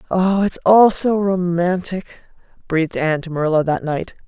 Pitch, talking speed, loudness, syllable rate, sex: 180 Hz, 155 wpm, -17 LUFS, 5.2 syllables/s, female